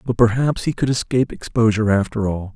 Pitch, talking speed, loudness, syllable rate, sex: 115 Hz, 190 wpm, -19 LUFS, 6.2 syllables/s, male